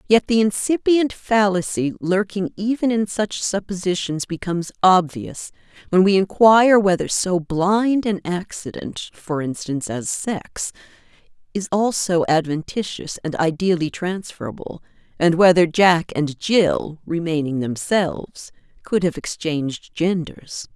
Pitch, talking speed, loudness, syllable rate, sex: 185 Hz, 115 wpm, -20 LUFS, 4.2 syllables/s, female